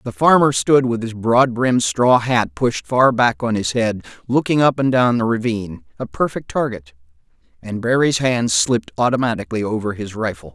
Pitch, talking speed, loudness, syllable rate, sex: 115 Hz, 180 wpm, -18 LUFS, 5.1 syllables/s, male